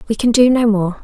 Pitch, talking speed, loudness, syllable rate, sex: 225 Hz, 290 wpm, -14 LUFS, 5.9 syllables/s, female